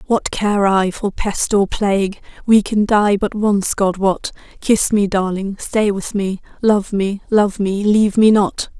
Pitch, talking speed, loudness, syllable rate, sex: 200 Hz, 170 wpm, -16 LUFS, 3.9 syllables/s, female